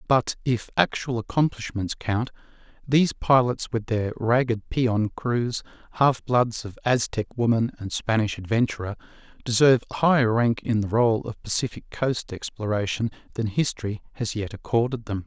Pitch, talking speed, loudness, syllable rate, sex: 115 Hz, 140 wpm, -24 LUFS, 4.7 syllables/s, male